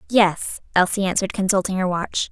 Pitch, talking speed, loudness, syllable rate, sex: 190 Hz, 155 wpm, -21 LUFS, 5.6 syllables/s, female